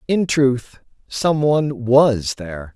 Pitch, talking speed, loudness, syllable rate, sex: 130 Hz, 130 wpm, -18 LUFS, 3.4 syllables/s, male